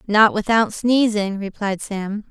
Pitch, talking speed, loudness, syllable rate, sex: 210 Hz, 130 wpm, -19 LUFS, 3.8 syllables/s, female